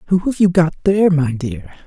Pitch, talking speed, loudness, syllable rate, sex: 170 Hz, 225 wpm, -16 LUFS, 5.7 syllables/s, male